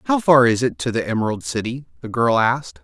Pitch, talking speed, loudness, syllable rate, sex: 125 Hz, 235 wpm, -19 LUFS, 6.0 syllables/s, male